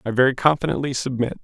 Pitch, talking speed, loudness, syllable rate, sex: 130 Hz, 165 wpm, -21 LUFS, 7.1 syllables/s, male